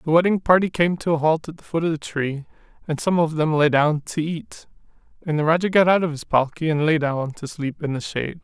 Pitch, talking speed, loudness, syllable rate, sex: 160 Hz, 265 wpm, -21 LUFS, 5.7 syllables/s, male